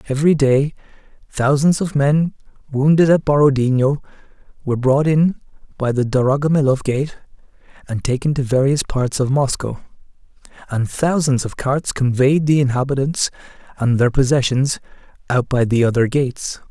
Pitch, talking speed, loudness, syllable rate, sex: 135 Hz, 135 wpm, -17 LUFS, 5.1 syllables/s, male